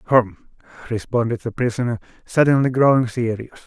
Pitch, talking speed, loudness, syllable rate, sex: 120 Hz, 115 wpm, -20 LUFS, 5.1 syllables/s, male